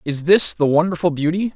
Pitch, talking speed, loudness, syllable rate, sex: 165 Hz, 195 wpm, -17 LUFS, 5.5 syllables/s, male